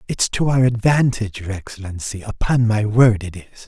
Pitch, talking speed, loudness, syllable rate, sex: 110 Hz, 180 wpm, -18 LUFS, 5.5 syllables/s, male